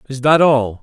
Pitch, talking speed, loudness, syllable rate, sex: 135 Hz, 220 wpm, -13 LUFS, 4.8 syllables/s, male